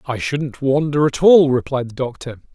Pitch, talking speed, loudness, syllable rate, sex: 135 Hz, 190 wpm, -17 LUFS, 4.7 syllables/s, male